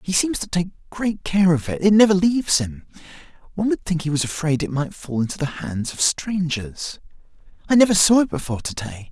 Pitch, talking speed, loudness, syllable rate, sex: 165 Hz, 210 wpm, -20 LUFS, 5.5 syllables/s, male